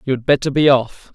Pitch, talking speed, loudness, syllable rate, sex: 135 Hz, 260 wpm, -15 LUFS, 5.7 syllables/s, male